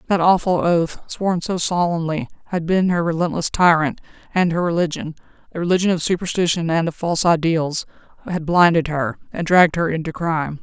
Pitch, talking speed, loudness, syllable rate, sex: 165 Hz, 160 wpm, -19 LUFS, 5.5 syllables/s, female